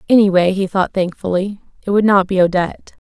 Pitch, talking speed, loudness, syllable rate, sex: 190 Hz, 175 wpm, -16 LUFS, 5.8 syllables/s, female